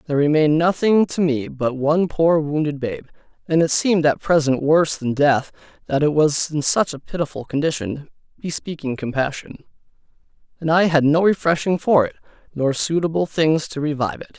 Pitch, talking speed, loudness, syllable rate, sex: 150 Hz, 170 wpm, -19 LUFS, 5.4 syllables/s, male